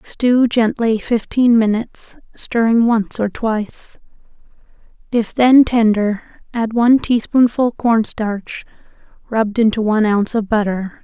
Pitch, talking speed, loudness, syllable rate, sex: 225 Hz, 115 wpm, -16 LUFS, 4.2 syllables/s, female